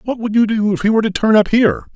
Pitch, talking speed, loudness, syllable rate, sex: 205 Hz, 340 wpm, -15 LUFS, 7.4 syllables/s, male